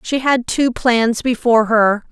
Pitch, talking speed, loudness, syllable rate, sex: 235 Hz, 170 wpm, -15 LUFS, 4.1 syllables/s, female